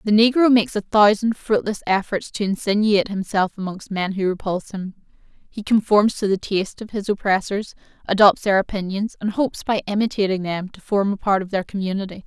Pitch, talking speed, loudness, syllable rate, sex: 200 Hz, 185 wpm, -20 LUFS, 5.7 syllables/s, female